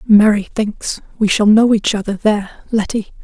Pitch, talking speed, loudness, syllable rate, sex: 210 Hz, 165 wpm, -15 LUFS, 5.0 syllables/s, female